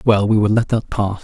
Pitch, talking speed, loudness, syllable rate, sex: 105 Hz, 290 wpm, -17 LUFS, 5.3 syllables/s, male